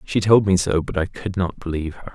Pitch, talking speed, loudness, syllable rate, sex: 95 Hz, 280 wpm, -20 LUFS, 5.9 syllables/s, male